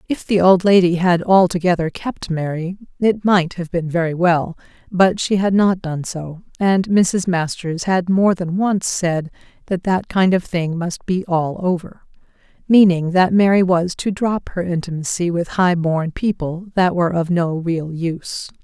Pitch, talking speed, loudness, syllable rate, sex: 180 Hz, 175 wpm, -18 LUFS, 4.3 syllables/s, female